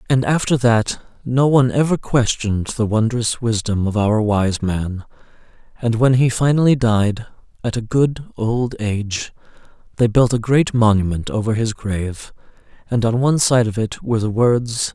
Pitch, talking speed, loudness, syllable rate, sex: 115 Hz, 165 wpm, -18 LUFS, 4.7 syllables/s, male